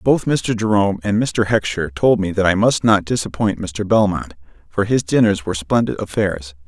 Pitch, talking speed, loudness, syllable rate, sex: 100 Hz, 190 wpm, -18 LUFS, 5.1 syllables/s, male